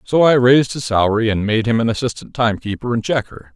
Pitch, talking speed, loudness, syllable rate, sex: 115 Hz, 220 wpm, -17 LUFS, 6.4 syllables/s, male